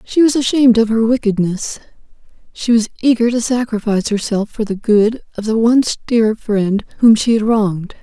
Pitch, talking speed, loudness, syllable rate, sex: 225 Hz, 180 wpm, -15 LUFS, 5.2 syllables/s, female